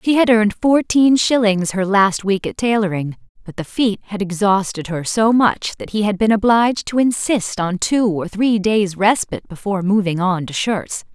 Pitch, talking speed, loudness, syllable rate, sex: 205 Hz, 195 wpm, -17 LUFS, 4.9 syllables/s, female